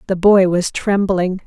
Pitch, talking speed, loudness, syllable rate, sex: 190 Hz, 165 wpm, -15 LUFS, 4.0 syllables/s, female